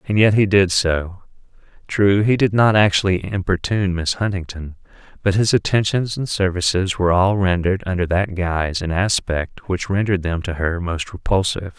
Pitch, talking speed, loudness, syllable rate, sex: 95 Hz, 170 wpm, -19 LUFS, 5.2 syllables/s, male